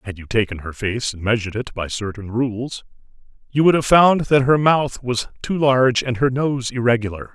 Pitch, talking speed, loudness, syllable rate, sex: 120 Hz, 205 wpm, -19 LUFS, 5.1 syllables/s, male